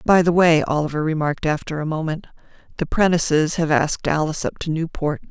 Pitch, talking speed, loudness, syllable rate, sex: 160 Hz, 180 wpm, -20 LUFS, 6.1 syllables/s, female